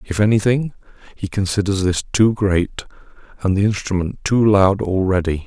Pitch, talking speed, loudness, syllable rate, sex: 100 Hz, 145 wpm, -18 LUFS, 5.0 syllables/s, male